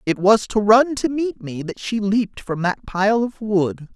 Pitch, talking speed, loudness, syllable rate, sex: 210 Hz, 230 wpm, -19 LUFS, 4.3 syllables/s, male